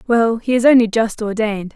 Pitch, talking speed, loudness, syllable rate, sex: 225 Hz, 205 wpm, -16 LUFS, 5.7 syllables/s, female